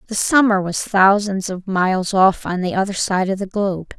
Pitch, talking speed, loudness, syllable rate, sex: 195 Hz, 210 wpm, -18 LUFS, 5.0 syllables/s, female